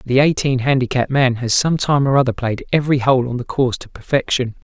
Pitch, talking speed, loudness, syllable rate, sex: 130 Hz, 230 wpm, -17 LUFS, 6.1 syllables/s, male